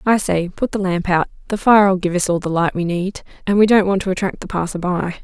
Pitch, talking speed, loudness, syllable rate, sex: 185 Hz, 250 wpm, -18 LUFS, 6.0 syllables/s, female